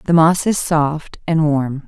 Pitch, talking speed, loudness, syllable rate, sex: 155 Hz, 190 wpm, -17 LUFS, 3.4 syllables/s, female